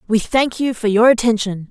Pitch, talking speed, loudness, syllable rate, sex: 225 Hz, 210 wpm, -16 LUFS, 5.2 syllables/s, female